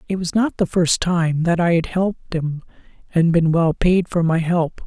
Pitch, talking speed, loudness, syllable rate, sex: 170 Hz, 220 wpm, -19 LUFS, 4.6 syllables/s, male